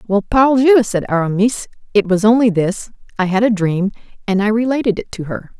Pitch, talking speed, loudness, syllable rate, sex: 210 Hz, 195 wpm, -15 LUFS, 5.4 syllables/s, female